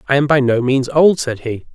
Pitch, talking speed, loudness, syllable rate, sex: 135 Hz, 275 wpm, -15 LUFS, 5.3 syllables/s, male